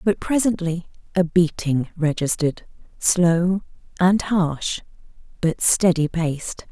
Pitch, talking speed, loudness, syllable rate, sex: 175 Hz, 100 wpm, -21 LUFS, 3.8 syllables/s, female